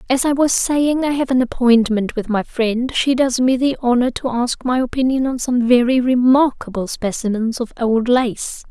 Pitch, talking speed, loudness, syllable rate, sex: 250 Hz, 195 wpm, -17 LUFS, 4.7 syllables/s, female